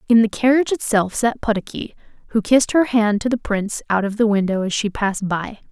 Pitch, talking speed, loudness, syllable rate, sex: 220 Hz, 220 wpm, -19 LUFS, 6.0 syllables/s, female